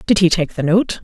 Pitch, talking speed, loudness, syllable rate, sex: 170 Hz, 290 wpm, -16 LUFS, 5.6 syllables/s, female